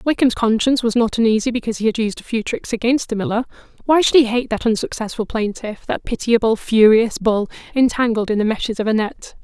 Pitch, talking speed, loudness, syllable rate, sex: 225 Hz, 210 wpm, -18 LUFS, 6.0 syllables/s, female